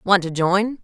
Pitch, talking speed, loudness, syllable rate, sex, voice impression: 190 Hz, 215 wpm, -19 LUFS, 3.8 syllables/s, female, feminine, very adult-like, clear, slightly intellectual, slightly elegant